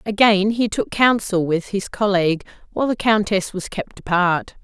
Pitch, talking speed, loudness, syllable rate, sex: 200 Hz, 170 wpm, -19 LUFS, 4.8 syllables/s, female